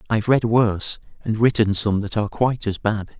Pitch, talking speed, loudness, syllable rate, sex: 110 Hz, 205 wpm, -20 LUFS, 5.7 syllables/s, male